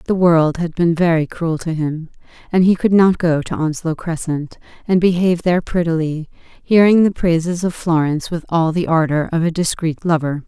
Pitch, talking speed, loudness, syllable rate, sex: 165 Hz, 190 wpm, -17 LUFS, 5.1 syllables/s, female